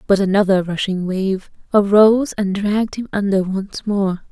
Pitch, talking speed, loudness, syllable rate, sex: 200 Hz, 155 wpm, -17 LUFS, 4.7 syllables/s, female